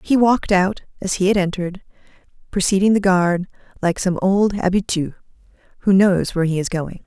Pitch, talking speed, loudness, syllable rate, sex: 190 Hz, 170 wpm, -19 LUFS, 5.5 syllables/s, female